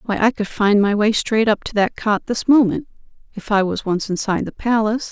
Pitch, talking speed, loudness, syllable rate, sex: 215 Hz, 235 wpm, -18 LUFS, 5.6 syllables/s, female